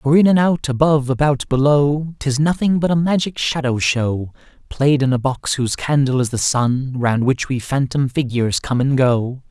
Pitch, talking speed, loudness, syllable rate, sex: 135 Hz, 195 wpm, -17 LUFS, 4.8 syllables/s, male